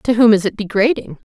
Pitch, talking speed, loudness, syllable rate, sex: 215 Hz, 230 wpm, -15 LUFS, 5.9 syllables/s, female